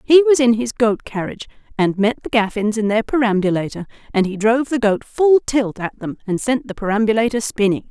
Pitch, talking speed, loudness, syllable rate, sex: 225 Hz, 205 wpm, -18 LUFS, 5.7 syllables/s, female